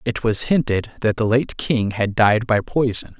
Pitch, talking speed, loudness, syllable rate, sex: 115 Hz, 205 wpm, -19 LUFS, 4.4 syllables/s, male